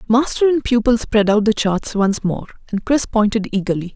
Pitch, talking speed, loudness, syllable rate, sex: 220 Hz, 195 wpm, -17 LUFS, 5.2 syllables/s, female